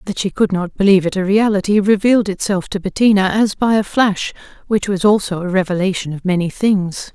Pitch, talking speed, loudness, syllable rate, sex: 195 Hz, 200 wpm, -16 LUFS, 5.7 syllables/s, female